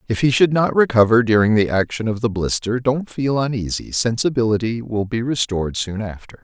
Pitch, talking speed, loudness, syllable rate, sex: 115 Hz, 185 wpm, -19 LUFS, 5.5 syllables/s, male